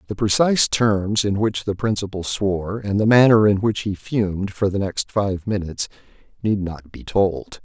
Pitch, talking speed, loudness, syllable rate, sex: 100 Hz, 190 wpm, -20 LUFS, 4.8 syllables/s, male